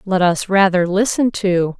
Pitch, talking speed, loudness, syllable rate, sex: 190 Hz, 170 wpm, -16 LUFS, 4.1 syllables/s, female